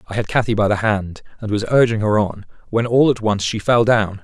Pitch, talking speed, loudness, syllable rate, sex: 110 Hz, 255 wpm, -18 LUFS, 5.6 syllables/s, male